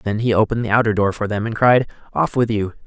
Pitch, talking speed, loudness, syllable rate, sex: 110 Hz, 270 wpm, -18 LUFS, 6.6 syllables/s, male